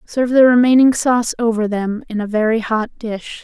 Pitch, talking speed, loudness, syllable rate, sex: 230 Hz, 190 wpm, -16 LUFS, 5.2 syllables/s, female